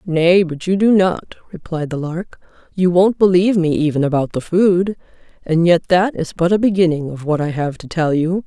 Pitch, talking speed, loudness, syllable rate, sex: 175 Hz, 215 wpm, -16 LUFS, 5.0 syllables/s, female